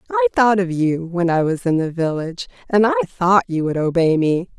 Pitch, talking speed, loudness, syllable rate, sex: 170 Hz, 225 wpm, -18 LUFS, 5.5 syllables/s, female